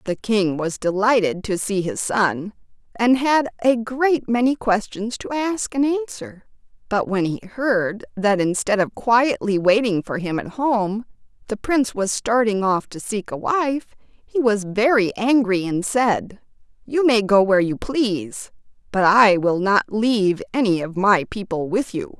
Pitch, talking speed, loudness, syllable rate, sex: 215 Hz, 170 wpm, -20 LUFS, 4.1 syllables/s, female